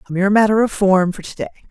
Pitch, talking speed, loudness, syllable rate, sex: 200 Hz, 280 wpm, -16 LUFS, 7.8 syllables/s, female